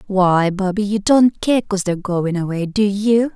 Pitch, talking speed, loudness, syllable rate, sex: 200 Hz, 195 wpm, -17 LUFS, 4.7 syllables/s, female